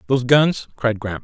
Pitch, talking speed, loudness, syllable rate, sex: 125 Hz, 195 wpm, -18 LUFS, 6.1 syllables/s, male